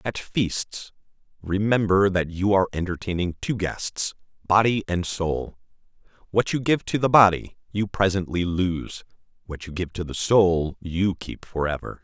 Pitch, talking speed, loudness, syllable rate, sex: 95 Hz, 155 wpm, -23 LUFS, 4.3 syllables/s, male